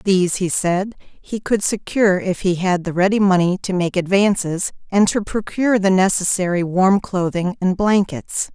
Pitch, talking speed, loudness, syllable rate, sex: 190 Hz, 170 wpm, -18 LUFS, 4.7 syllables/s, female